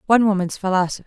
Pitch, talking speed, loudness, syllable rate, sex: 195 Hz, 170 wpm, -19 LUFS, 8.3 syllables/s, female